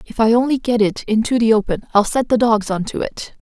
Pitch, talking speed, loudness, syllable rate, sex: 225 Hz, 260 wpm, -17 LUFS, 5.6 syllables/s, female